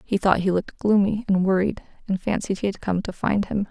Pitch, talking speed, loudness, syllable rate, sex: 195 Hz, 245 wpm, -23 LUFS, 5.7 syllables/s, female